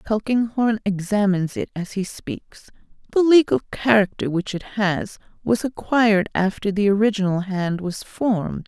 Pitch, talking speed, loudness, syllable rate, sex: 205 Hz, 130 wpm, -21 LUFS, 4.8 syllables/s, female